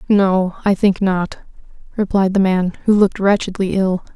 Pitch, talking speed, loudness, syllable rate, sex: 190 Hz, 160 wpm, -17 LUFS, 4.8 syllables/s, female